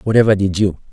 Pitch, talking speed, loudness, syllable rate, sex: 100 Hz, 195 wpm, -15 LUFS, 7.0 syllables/s, male